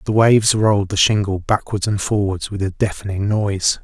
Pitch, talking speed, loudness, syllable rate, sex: 100 Hz, 190 wpm, -18 LUFS, 5.4 syllables/s, male